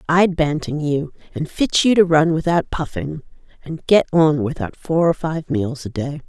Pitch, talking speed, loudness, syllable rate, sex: 155 Hz, 190 wpm, -19 LUFS, 4.4 syllables/s, female